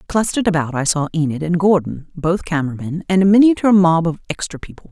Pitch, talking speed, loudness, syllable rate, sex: 175 Hz, 210 wpm, -17 LUFS, 6.4 syllables/s, female